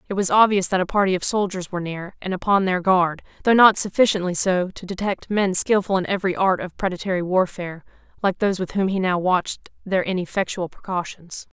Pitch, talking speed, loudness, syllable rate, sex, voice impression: 185 Hz, 195 wpm, -21 LUFS, 5.9 syllables/s, female, very feminine, slightly young, slightly adult-like, thin, tensed, very powerful, bright, hard, clear, very fluent, slightly raspy, cool, very intellectual, refreshing, very sincere, slightly calm, friendly, very reassuring, slightly unique, elegant, slightly wild, slightly sweet, lively, strict, intense, slightly sharp